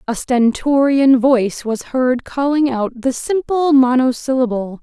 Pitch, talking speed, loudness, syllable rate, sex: 255 Hz, 125 wpm, -16 LUFS, 4.1 syllables/s, female